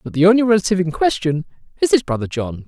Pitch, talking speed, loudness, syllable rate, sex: 180 Hz, 225 wpm, -17 LUFS, 7.2 syllables/s, male